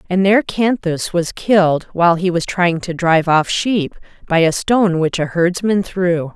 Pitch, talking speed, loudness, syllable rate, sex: 180 Hz, 190 wpm, -16 LUFS, 4.7 syllables/s, female